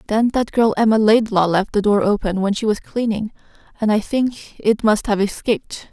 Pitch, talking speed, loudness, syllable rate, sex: 215 Hz, 205 wpm, -18 LUFS, 5.0 syllables/s, female